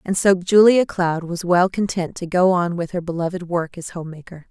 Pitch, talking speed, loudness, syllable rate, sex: 175 Hz, 225 wpm, -19 LUFS, 5.0 syllables/s, female